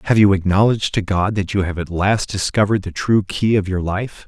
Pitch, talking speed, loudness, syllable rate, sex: 100 Hz, 240 wpm, -18 LUFS, 5.7 syllables/s, male